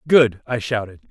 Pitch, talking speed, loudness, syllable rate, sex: 120 Hz, 165 wpm, -20 LUFS, 4.9 syllables/s, male